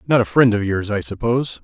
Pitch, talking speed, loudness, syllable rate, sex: 115 Hz, 255 wpm, -18 LUFS, 6.1 syllables/s, male